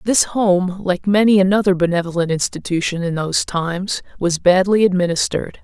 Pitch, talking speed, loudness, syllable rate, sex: 185 Hz, 140 wpm, -17 LUFS, 5.5 syllables/s, female